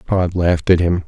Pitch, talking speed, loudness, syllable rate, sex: 85 Hz, 225 wpm, -16 LUFS, 5.3 syllables/s, male